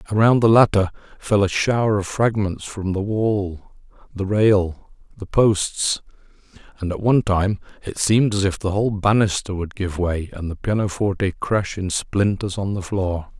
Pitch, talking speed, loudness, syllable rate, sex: 100 Hz, 170 wpm, -20 LUFS, 4.6 syllables/s, male